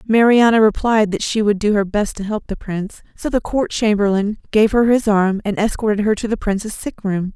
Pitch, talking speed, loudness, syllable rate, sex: 210 Hz, 230 wpm, -17 LUFS, 5.4 syllables/s, female